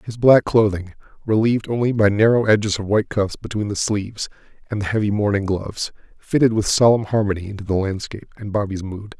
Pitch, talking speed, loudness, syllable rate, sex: 105 Hz, 190 wpm, -19 LUFS, 6.1 syllables/s, male